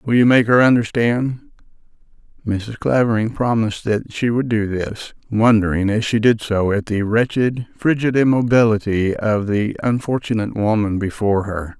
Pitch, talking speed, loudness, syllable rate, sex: 110 Hz, 150 wpm, -18 LUFS, 4.8 syllables/s, male